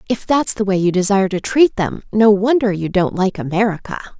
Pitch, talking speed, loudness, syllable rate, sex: 205 Hz, 215 wpm, -16 LUFS, 5.6 syllables/s, female